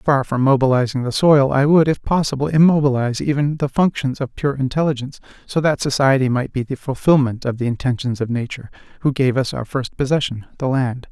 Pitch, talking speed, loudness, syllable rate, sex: 135 Hz, 195 wpm, -18 LUFS, 5.9 syllables/s, male